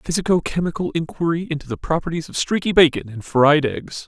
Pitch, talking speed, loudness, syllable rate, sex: 160 Hz, 190 wpm, -20 LUFS, 6.0 syllables/s, male